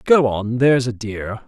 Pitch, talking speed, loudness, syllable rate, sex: 120 Hz, 205 wpm, -18 LUFS, 4.5 syllables/s, male